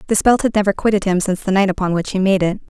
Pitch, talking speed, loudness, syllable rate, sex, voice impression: 195 Hz, 305 wpm, -17 LUFS, 7.4 syllables/s, female, very feminine, adult-like, clear, slightly fluent, slightly refreshing, sincere